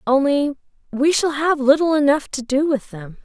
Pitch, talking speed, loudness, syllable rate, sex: 280 Hz, 185 wpm, -18 LUFS, 4.8 syllables/s, female